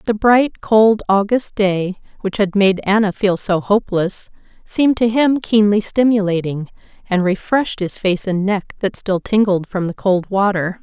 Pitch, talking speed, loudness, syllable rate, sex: 200 Hz, 165 wpm, -16 LUFS, 4.5 syllables/s, female